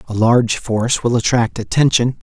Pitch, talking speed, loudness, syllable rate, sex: 120 Hz, 160 wpm, -16 LUFS, 5.4 syllables/s, male